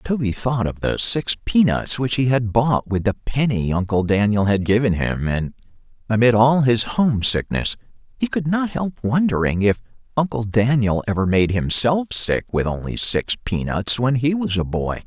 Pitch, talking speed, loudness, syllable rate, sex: 115 Hz, 185 wpm, -20 LUFS, 4.6 syllables/s, male